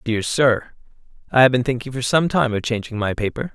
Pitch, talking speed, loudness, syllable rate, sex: 125 Hz, 205 wpm, -19 LUFS, 5.6 syllables/s, male